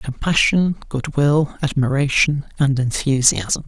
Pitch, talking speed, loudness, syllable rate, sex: 140 Hz, 80 wpm, -18 LUFS, 3.9 syllables/s, male